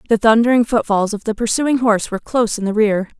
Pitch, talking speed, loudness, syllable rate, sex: 220 Hz, 225 wpm, -16 LUFS, 6.5 syllables/s, female